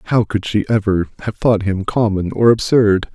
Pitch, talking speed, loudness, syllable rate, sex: 105 Hz, 190 wpm, -16 LUFS, 4.7 syllables/s, male